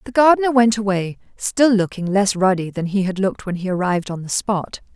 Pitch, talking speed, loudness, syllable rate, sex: 200 Hz, 220 wpm, -19 LUFS, 5.7 syllables/s, female